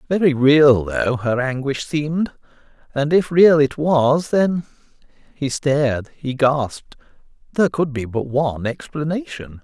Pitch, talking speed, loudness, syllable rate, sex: 145 Hz, 125 wpm, -19 LUFS, 4.3 syllables/s, male